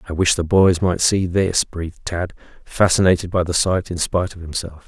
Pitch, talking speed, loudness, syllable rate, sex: 90 Hz, 210 wpm, -19 LUFS, 5.3 syllables/s, male